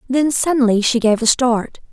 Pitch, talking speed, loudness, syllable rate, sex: 245 Hz, 190 wpm, -16 LUFS, 4.8 syllables/s, female